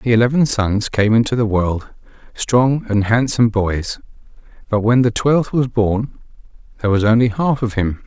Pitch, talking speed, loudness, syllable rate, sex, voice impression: 115 Hz, 170 wpm, -17 LUFS, 4.8 syllables/s, male, very masculine, slightly old, very thick, very tensed, powerful, bright, soft, very clear, very fluent, slightly raspy, very cool, intellectual, refreshing, very sincere, calm, mature, very friendly, very reassuring, unique, elegant, very wild, sweet, lively, kind, slightly modest